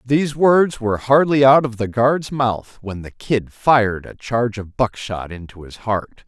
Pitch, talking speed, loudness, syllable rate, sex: 120 Hz, 190 wpm, -18 LUFS, 4.4 syllables/s, male